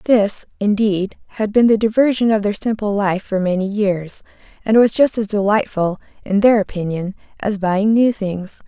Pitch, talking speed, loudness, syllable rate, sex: 205 Hz, 175 wpm, -17 LUFS, 4.7 syllables/s, female